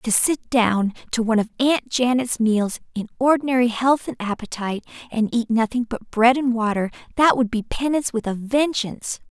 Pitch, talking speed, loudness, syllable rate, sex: 235 Hz, 175 wpm, -21 LUFS, 5.2 syllables/s, female